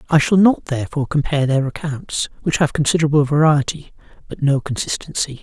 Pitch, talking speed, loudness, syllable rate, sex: 145 Hz, 155 wpm, -18 LUFS, 6.3 syllables/s, male